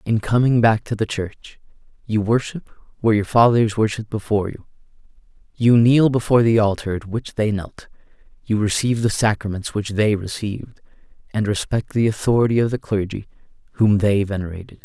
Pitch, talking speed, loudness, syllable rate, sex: 110 Hz, 160 wpm, -19 LUFS, 5.5 syllables/s, male